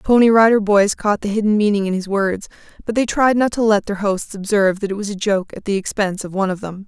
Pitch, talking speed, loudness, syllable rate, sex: 205 Hz, 280 wpm, -17 LUFS, 6.3 syllables/s, female